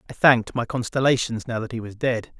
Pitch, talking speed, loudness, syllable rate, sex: 120 Hz, 225 wpm, -23 LUFS, 6.1 syllables/s, male